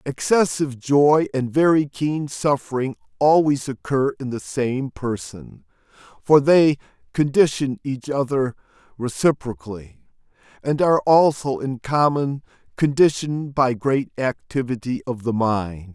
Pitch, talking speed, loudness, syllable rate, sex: 135 Hz, 115 wpm, -20 LUFS, 4.2 syllables/s, male